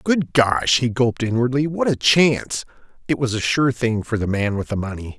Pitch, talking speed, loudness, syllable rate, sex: 120 Hz, 220 wpm, -20 LUFS, 5.2 syllables/s, male